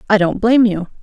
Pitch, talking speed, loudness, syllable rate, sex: 210 Hz, 235 wpm, -14 LUFS, 6.8 syllables/s, female